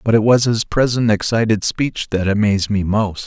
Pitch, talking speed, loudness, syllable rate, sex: 110 Hz, 200 wpm, -17 LUFS, 5.1 syllables/s, male